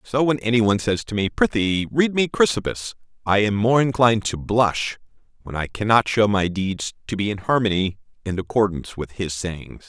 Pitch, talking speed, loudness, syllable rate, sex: 110 Hz, 195 wpm, -21 LUFS, 5.3 syllables/s, male